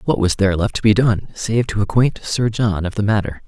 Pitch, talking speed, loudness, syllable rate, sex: 105 Hz, 260 wpm, -18 LUFS, 5.6 syllables/s, male